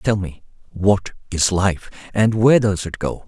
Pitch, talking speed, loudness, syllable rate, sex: 100 Hz, 185 wpm, -19 LUFS, 4.3 syllables/s, male